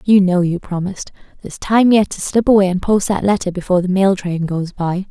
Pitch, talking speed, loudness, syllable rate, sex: 190 Hz, 235 wpm, -16 LUFS, 5.7 syllables/s, female